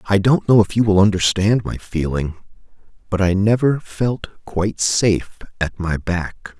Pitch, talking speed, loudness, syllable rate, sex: 100 Hz, 165 wpm, -18 LUFS, 4.6 syllables/s, male